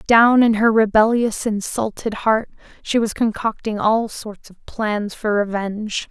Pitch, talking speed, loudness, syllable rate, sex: 215 Hz, 145 wpm, -19 LUFS, 4.1 syllables/s, female